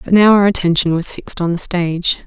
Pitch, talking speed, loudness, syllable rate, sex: 180 Hz, 240 wpm, -14 LUFS, 6.2 syllables/s, female